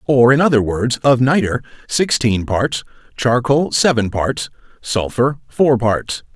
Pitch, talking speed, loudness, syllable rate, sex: 125 Hz, 130 wpm, -16 LUFS, 3.9 syllables/s, male